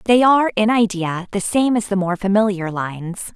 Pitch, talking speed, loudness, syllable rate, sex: 200 Hz, 195 wpm, -18 LUFS, 5.3 syllables/s, female